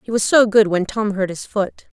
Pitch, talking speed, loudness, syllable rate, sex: 205 Hz, 270 wpm, -18 LUFS, 5.0 syllables/s, female